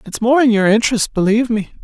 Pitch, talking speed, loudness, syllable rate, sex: 225 Hz, 230 wpm, -14 LUFS, 6.9 syllables/s, male